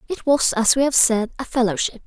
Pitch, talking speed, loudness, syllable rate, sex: 245 Hz, 235 wpm, -18 LUFS, 5.5 syllables/s, female